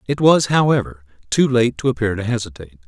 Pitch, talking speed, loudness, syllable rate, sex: 115 Hz, 190 wpm, -17 LUFS, 6.2 syllables/s, male